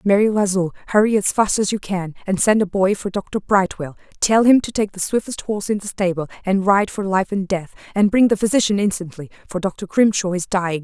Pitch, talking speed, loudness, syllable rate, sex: 195 Hz, 225 wpm, -19 LUFS, 5.6 syllables/s, female